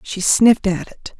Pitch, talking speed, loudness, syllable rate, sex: 200 Hz, 200 wpm, -16 LUFS, 4.6 syllables/s, female